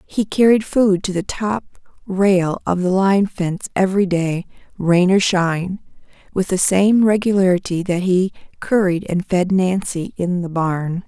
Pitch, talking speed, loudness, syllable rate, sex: 185 Hz, 155 wpm, -18 LUFS, 4.3 syllables/s, female